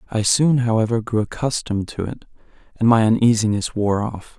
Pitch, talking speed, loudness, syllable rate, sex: 110 Hz, 165 wpm, -19 LUFS, 5.5 syllables/s, male